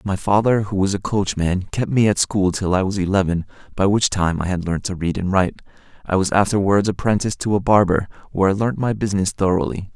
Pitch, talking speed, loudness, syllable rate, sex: 100 Hz, 225 wpm, -19 LUFS, 6.1 syllables/s, male